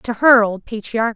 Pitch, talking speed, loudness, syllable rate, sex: 225 Hz, 205 wpm, -15 LUFS, 4.3 syllables/s, female